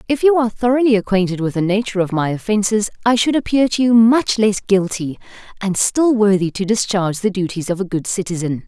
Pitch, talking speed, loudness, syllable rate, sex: 205 Hz, 210 wpm, -17 LUFS, 5.9 syllables/s, female